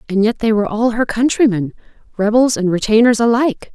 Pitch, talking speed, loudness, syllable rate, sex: 220 Hz, 160 wpm, -15 LUFS, 6.0 syllables/s, female